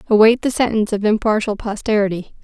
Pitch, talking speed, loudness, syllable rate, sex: 215 Hz, 150 wpm, -17 LUFS, 6.5 syllables/s, female